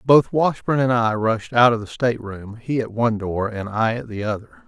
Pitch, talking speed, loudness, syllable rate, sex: 115 Hz, 245 wpm, -20 LUFS, 5.3 syllables/s, male